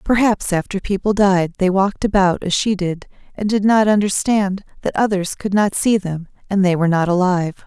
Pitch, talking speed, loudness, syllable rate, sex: 195 Hz, 195 wpm, -17 LUFS, 5.2 syllables/s, female